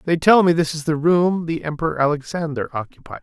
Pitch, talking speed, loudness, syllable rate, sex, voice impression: 160 Hz, 205 wpm, -19 LUFS, 5.9 syllables/s, male, very masculine, middle-aged, thick, slightly relaxed, powerful, bright, soft, clear, fluent, cool, very intellectual, very refreshing, sincere, slightly calm, friendly, reassuring, slightly unique, slightly elegant, wild, sweet, very lively, kind